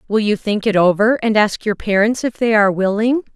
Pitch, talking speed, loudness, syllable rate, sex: 215 Hz, 230 wpm, -16 LUFS, 5.5 syllables/s, female